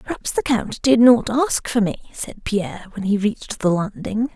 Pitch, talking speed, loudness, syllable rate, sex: 225 Hz, 205 wpm, -20 LUFS, 4.7 syllables/s, female